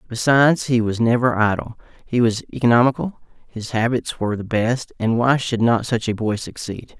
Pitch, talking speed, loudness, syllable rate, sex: 115 Hz, 180 wpm, -19 LUFS, 5.2 syllables/s, male